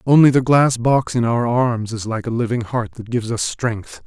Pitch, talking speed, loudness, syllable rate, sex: 120 Hz, 235 wpm, -18 LUFS, 4.9 syllables/s, male